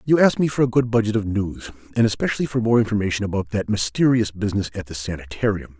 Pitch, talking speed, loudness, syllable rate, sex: 105 Hz, 220 wpm, -21 LUFS, 6.7 syllables/s, male